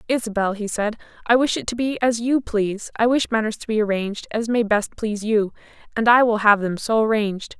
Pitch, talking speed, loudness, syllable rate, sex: 220 Hz, 230 wpm, -21 LUFS, 5.7 syllables/s, female